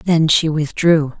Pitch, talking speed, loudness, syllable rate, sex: 155 Hz, 150 wpm, -15 LUFS, 3.5 syllables/s, female